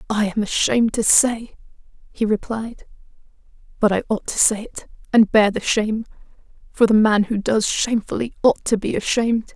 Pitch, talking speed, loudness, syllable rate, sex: 220 Hz, 170 wpm, -19 LUFS, 5.3 syllables/s, female